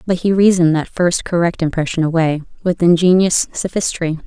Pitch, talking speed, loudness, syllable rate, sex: 170 Hz, 155 wpm, -15 LUFS, 5.5 syllables/s, female